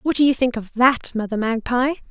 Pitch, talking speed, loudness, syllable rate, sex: 245 Hz, 230 wpm, -20 LUFS, 5.2 syllables/s, female